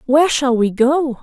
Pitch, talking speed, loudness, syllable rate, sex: 270 Hz, 195 wpm, -15 LUFS, 4.6 syllables/s, female